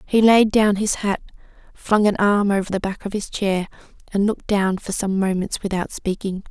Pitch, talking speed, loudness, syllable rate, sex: 200 Hz, 205 wpm, -20 LUFS, 5.1 syllables/s, female